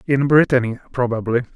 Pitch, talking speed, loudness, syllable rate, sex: 125 Hz, 115 wpm, -18 LUFS, 6.0 syllables/s, male